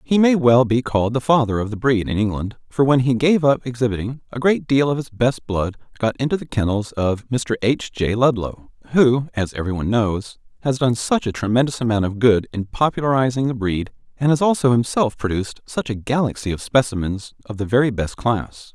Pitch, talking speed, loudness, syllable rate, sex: 120 Hz, 210 wpm, -20 LUFS, 5.4 syllables/s, male